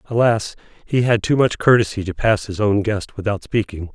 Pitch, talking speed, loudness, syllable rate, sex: 105 Hz, 200 wpm, -19 LUFS, 5.1 syllables/s, male